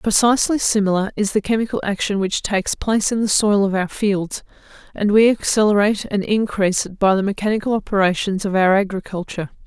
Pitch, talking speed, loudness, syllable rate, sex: 205 Hz, 175 wpm, -18 LUFS, 6.0 syllables/s, female